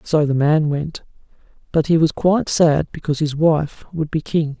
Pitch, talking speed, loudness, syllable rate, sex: 155 Hz, 195 wpm, -18 LUFS, 4.9 syllables/s, male